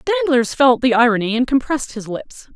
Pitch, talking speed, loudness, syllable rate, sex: 260 Hz, 190 wpm, -16 LUFS, 6.5 syllables/s, female